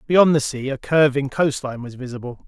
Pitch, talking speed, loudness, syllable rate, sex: 135 Hz, 195 wpm, -20 LUFS, 5.7 syllables/s, male